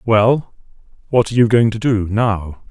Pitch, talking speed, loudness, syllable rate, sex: 110 Hz, 175 wpm, -16 LUFS, 4.5 syllables/s, male